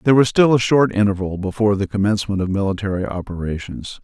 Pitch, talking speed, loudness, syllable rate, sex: 100 Hz, 180 wpm, -18 LUFS, 6.7 syllables/s, male